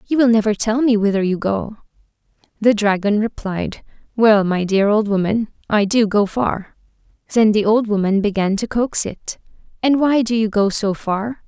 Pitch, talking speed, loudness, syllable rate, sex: 215 Hz, 185 wpm, -17 LUFS, 4.7 syllables/s, female